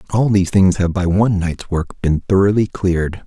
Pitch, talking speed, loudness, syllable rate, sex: 95 Hz, 200 wpm, -16 LUFS, 5.3 syllables/s, male